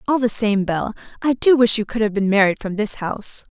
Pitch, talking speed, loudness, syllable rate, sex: 215 Hz, 255 wpm, -18 LUFS, 5.7 syllables/s, female